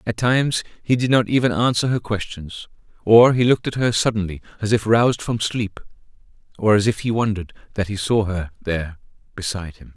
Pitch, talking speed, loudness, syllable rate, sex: 110 Hz, 195 wpm, -20 LUFS, 5.9 syllables/s, male